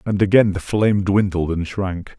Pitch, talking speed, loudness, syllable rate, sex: 95 Hz, 190 wpm, -18 LUFS, 4.8 syllables/s, male